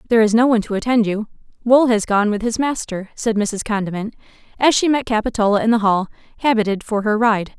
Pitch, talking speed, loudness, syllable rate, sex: 220 Hz, 215 wpm, -18 LUFS, 6.2 syllables/s, female